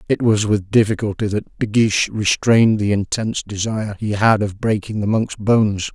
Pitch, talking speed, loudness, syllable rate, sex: 105 Hz, 180 wpm, -18 LUFS, 5.2 syllables/s, male